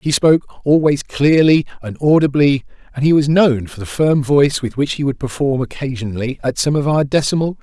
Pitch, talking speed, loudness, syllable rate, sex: 140 Hz, 205 wpm, -16 LUFS, 5.8 syllables/s, male